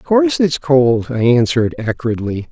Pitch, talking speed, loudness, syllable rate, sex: 135 Hz, 145 wpm, -15 LUFS, 4.5 syllables/s, male